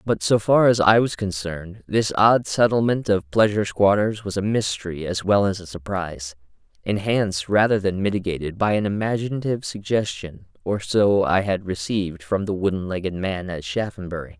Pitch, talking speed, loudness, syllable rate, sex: 100 Hz, 170 wpm, -21 LUFS, 5.3 syllables/s, male